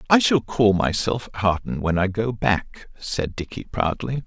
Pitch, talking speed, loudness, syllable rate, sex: 105 Hz, 170 wpm, -22 LUFS, 4.2 syllables/s, male